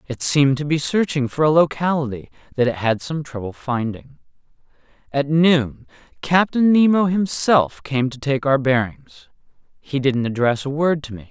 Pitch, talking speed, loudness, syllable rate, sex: 140 Hz, 165 wpm, -19 LUFS, 4.7 syllables/s, male